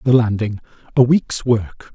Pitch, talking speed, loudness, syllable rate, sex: 115 Hz, 155 wpm, -18 LUFS, 4.3 syllables/s, male